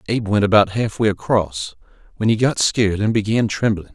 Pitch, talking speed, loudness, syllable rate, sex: 105 Hz, 200 wpm, -18 LUFS, 5.7 syllables/s, male